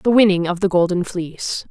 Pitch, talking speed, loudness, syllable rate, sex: 185 Hz, 210 wpm, -18 LUFS, 5.5 syllables/s, female